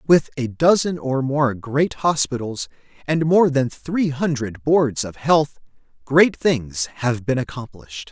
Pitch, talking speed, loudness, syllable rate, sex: 140 Hz, 150 wpm, -20 LUFS, 3.8 syllables/s, male